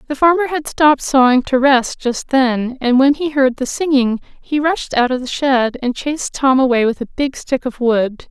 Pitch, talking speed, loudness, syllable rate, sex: 265 Hz, 225 wpm, -15 LUFS, 4.7 syllables/s, female